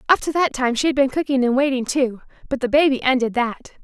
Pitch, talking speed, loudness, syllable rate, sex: 265 Hz, 235 wpm, -19 LUFS, 5.8 syllables/s, female